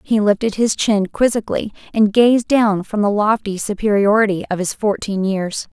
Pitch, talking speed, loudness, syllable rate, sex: 210 Hz, 165 wpm, -17 LUFS, 4.8 syllables/s, female